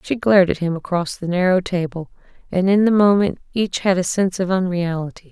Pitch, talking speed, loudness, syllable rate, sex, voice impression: 185 Hz, 205 wpm, -18 LUFS, 5.8 syllables/s, female, very feminine, slightly young, adult-like, thin, slightly tensed, slightly weak, slightly bright, hard, slightly clear, fluent, slightly raspy, cute, slightly cool, intellectual, refreshing, sincere, very calm, friendly, reassuring, very unique, elegant, very wild, sweet, slightly lively, kind, slightly intense, slightly sharp, modest